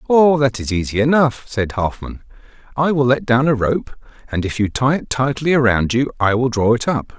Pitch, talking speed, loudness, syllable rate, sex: 125 Hz, 215 wpm, -17 LUFS, 5.0 syllables/s, male